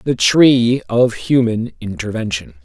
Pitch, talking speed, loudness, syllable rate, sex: 110 Hz, 115 wpm, -15 LUFS, 3.5 syllables/s, male